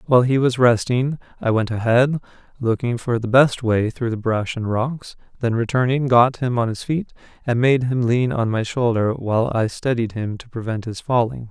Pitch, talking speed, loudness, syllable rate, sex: 120 Hz, 205 wpm, -20 LUFS, 5.0 syllables/s, male